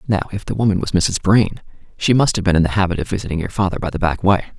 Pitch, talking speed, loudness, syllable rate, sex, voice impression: 95 Hz, 290 wpm, -18 LUFS, 7.7 syllables/s, male, very masculine, very middle-aged, very thick, very relaxed, very powerful, bright, slightly hard, very muffled, very fluent, slightly raspy, very cool, intellectual, sincere, very calm, very mature, very friendly, very reassuring, very unique, elegant, wild, very sweet, lively, kind, slightly modest